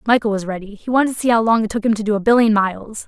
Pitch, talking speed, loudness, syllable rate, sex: 220 Hz, 330 wpm, -17 LUFS, 7.5 syllables/s, female